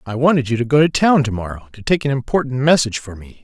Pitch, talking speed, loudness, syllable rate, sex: 130 Hz, 280 wpm, -17 LUFS, 6.7 syllables/s, male